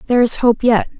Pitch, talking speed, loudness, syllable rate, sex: 230 Hz, 240 wpm, -14 LUFS, 6.8 syllables/s, female